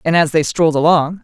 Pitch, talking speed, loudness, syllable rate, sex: 160 Hz, 245 wpm, -14 LUFS, 6.2 syllables/s, female